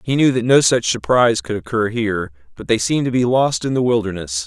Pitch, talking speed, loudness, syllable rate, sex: 110 Hz, 240 wpm, -17 LUFS, 6.1 syllables/s, male